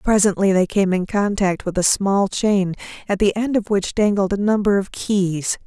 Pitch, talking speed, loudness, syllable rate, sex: 200 Hz, 200 wpm, -19 LUFS, 4.6 syllables/s, female